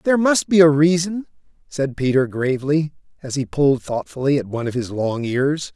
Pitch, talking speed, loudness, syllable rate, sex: 145 Hz, 190 wpm, -19 LUFS, 5.5 syllables/s, male